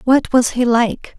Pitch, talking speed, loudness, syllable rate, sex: 245 Hz, 205 wpm, -15 LUFS, 3.7 syllables/s, female